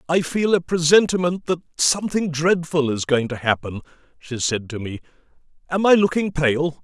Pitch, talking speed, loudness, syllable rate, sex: 160 Hz, 165 wpm, -20 LUFS, 5.0 syllables/s, male